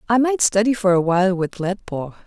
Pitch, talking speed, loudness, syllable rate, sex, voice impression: 200 Hz, 210 wpm, -19 LUFS, 6.0 syllables/s, female, feminine, slightly middle-aged, tensed, powerful, soft, clear, intellectual, calm, reassuring, elegant, lively, slightly sharp